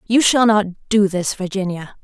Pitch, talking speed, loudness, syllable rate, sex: 200 Hz, 175 wpm, -17 LUFS, 4.9 syllables/s, female